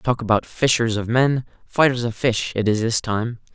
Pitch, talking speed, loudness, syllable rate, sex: 115 Hz, 185 wpm, -20 LUFS, 4.7 syllables/s, male